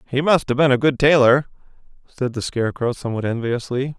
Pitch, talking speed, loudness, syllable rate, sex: 130 Hz, 180 wpm, -19 LUFS, 6.1 syllables/s, male